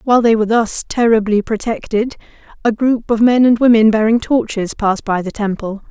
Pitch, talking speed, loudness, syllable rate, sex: 225 Hz, 185 wpm, -15 LUFS, 5.5 syllables/s, female